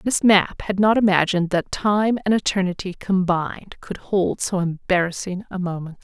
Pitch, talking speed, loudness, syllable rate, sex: 190 Hz, 160 wpm, -20 LUFS, 4.8 syllables/s, female